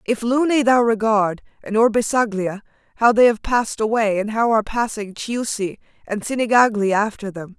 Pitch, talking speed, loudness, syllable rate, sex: 220 Hz, 160 wpm, -19 LUFS, 5.2 syllables/s, female